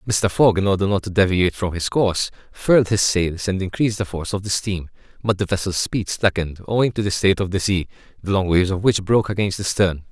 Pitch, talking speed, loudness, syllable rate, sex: 95 Hz, 245 wpm, -20 LUFS, 6.4 syllables/s, male